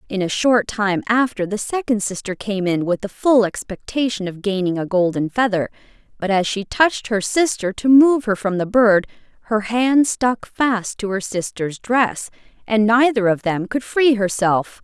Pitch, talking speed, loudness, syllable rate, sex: 215 Hz, 185 wpm, -18 LUFS, 4.5 syllables/s, female